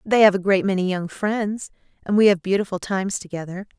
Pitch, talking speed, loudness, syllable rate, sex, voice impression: 195 Hz, 205 wpm, -21 LUFS, 5.8 syllables/s, female, feminine, slightly adult-like, slightly clear, slightly intellectual, calm, friendly, slightly sweet